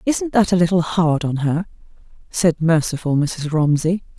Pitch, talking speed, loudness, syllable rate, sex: 170 Hz, 160 wpm, -18 LUFS, 4.5 syllables/s, female